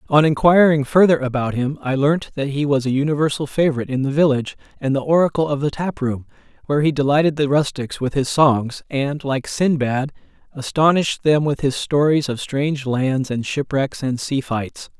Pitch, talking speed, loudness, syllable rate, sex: 140 Hz, 190 wpm, -19 LUFS, 5.3 syllables/s, male